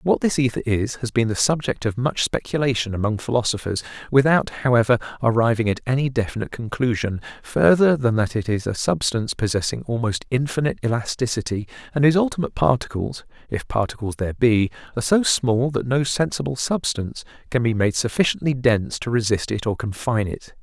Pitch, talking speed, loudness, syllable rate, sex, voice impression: 120 Hz, 165 wpm, -21 LUFS, 5.9 syllables/s, male, masculine, adult-like, tensed, slightly powerful, clear, fluent, intellectual, friendly, reassuring, wild, slightly lively, kind